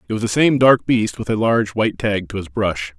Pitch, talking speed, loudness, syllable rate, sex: 105 Hz, 280 wpm, -18 LUFS, 5.8 syllables/s, male